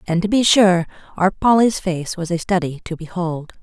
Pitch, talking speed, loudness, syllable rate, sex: 180 Hz, 200 wpm, -18 LUFS, 4.9 syllables/s, female